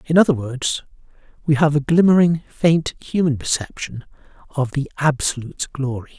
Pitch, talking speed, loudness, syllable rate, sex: 145 Hz, 135 wpm, -19 LUFS, 5.0 syllables/s, male